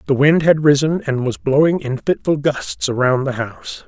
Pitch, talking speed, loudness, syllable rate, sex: 145 Hz, 200 wpm, -17 LUFS, 4.6 syllables/s, male